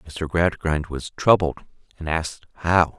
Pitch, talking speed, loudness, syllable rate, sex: 80 Hz, 140 wpm, -22 LUFS, 4.3 syllables/s, male